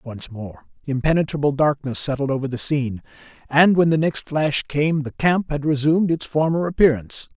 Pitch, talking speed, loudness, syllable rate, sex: 145 Hz, 170 wpm, -20 LUFS, 5.3 syllables/s, male